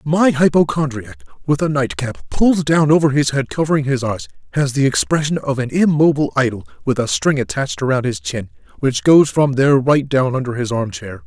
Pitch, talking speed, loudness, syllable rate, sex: 130 Hz, 190 wpm, -17 LUFS, 5.6 syllables/s, male